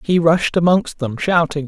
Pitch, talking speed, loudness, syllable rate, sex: 165 Hz, 180 wpm, -17 LUFS, 4.5 syllables/s, male